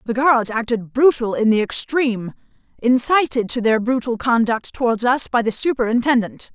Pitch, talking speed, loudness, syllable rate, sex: 235 Hz, 155 wpm, -18 LUFS, 5.1 syllables/s, female